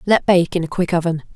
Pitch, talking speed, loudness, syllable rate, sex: 175 Hz, 265 wpm, -18 LUFS, 6.3 syllables/s, female